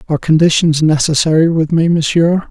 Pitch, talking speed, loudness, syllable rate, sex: 160 Hz, 145 wpm, -12 LUFS, 5.6 syllables/s, male